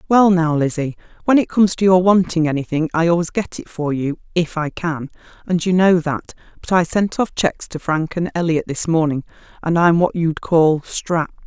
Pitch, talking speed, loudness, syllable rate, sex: 170 Hz, 205 wpm, -18 LUFS, 5.2 syllables/s, female